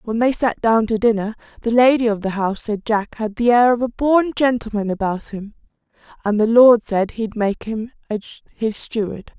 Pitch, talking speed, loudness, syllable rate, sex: 225 Hz, 200 wpm, -18 LUFS, 5.0 syllables/s, female